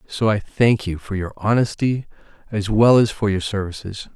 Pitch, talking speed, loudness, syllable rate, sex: 105 Hz, 190 wpm, -20 LUFS, 4.8 syllables/s, male